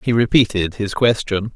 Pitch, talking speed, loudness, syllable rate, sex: 110 Hz, 155 wpm, -17 LUFS, 4.8 syllables/s, male